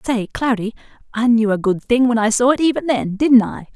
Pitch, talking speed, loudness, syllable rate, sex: 235 Hz, 240 wpm, -17 LUFS, 5.4 syllables/s, female